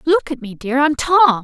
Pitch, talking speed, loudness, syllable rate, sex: 280 Hz, 210 wpm, -16 LUFS, 4.4 syllables/s, female